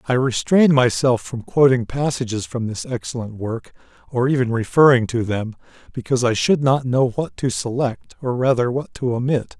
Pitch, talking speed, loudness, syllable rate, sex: 125 Hz, 175 wpm, -19 LUFS, 5.1 syllables/s, male